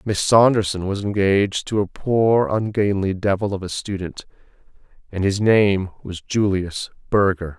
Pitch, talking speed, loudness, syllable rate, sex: 100 Hz, 140 wpm, -20 LUFS, 4.4 syllables/s, male